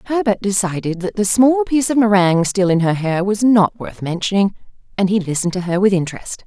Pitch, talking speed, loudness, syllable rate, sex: 200 Hz, 215 wpm, -16 LUFS, 6.0 syllables/s, female